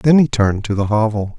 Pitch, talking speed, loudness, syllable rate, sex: 115 Hz, 260 wpm, -16 LUFS, 5.9 syllables/s, male